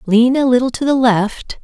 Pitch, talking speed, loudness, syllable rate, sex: 245 Hz, 220 wpm, -14 LUFS, 4.6 syllables/s, female